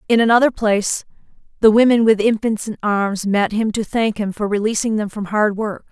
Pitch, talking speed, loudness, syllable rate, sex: 215 Hz, 205 wpm, -17 LUFS, 5.3 syllables/s, female